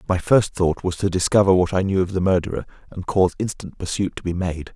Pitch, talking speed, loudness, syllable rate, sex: 95 Hz, 240 wpm, -21 LUFS, 6.1 syllables/s, male